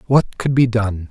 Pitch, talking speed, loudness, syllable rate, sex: 115 Hz, 220 wpm, -17 LUFS, 4.2 syllables/s, male